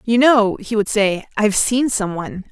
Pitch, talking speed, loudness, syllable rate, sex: 215 Hz, 190 wpm, -17 LUFS, 4.9 syllables/s, female